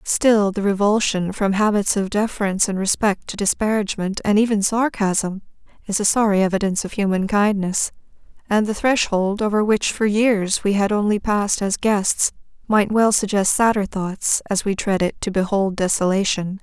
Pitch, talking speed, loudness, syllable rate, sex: 205 Hz, 165 wpm, -19 LUFS, 5.0 syllables/s, female